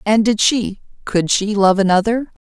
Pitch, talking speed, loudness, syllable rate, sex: 210 Hz, 170 wpm, -16 LUFS, 4.5 syllables/s, female